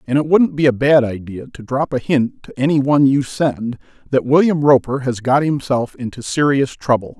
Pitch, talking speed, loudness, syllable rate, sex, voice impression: 135 Hz, 210 wpm, -16 LUFS, 5.1 syllables/s, male, masculine, middle-aged, thick, tensed, powerful, hard, raspy, mature, friendly, wild, lively, strict